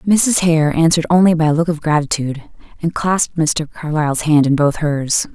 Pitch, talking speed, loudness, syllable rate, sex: 160 Hz, 190 wpm, -15 LUFS, 5.4 syllables/s, female